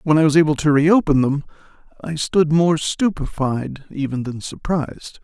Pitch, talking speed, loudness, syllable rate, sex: 155 Hz, 160 wpm, -19 LUFS, 4.7 syllables/s, male